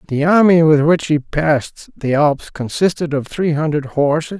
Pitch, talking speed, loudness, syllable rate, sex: 155 Hz, 175 wpm, -16 LUFS, 4.6 syllables/s, male